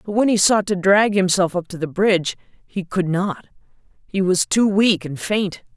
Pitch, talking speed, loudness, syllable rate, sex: 190 Hz, 210 wpm, -19 LUFS, 4.7 syllables/s, female